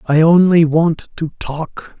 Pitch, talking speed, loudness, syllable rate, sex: 160 Hz, 150 wpm, -14 LUFS, 3.4 syllables/s, male